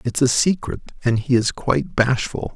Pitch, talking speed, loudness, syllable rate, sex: 125 Hz, 190 wpm, -20 LUFS, 5.0 syllables/s, male